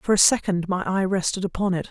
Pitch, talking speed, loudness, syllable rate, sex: 190 Hz, 250 wpm, -22 LUFS, 6.0 syllables/s, female